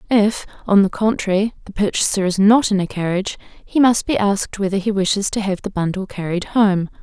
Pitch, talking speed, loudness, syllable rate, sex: 200 Hz, 205 wpm, -18 LUFS, 5.6 syllables/s, female